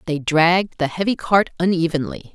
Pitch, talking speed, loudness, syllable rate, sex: 170 Hz, 155 wpm, -19 LUFS, 5.1 syllables/s, female